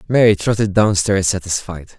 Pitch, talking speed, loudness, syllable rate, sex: 100 Hz, 150 wpm, -16 LUFS, 5.2 syllables/s, male